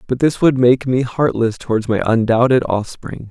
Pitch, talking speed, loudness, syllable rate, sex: 120 Hz, 180 wpm, -16 LUFS, 4.8 syllables/s, male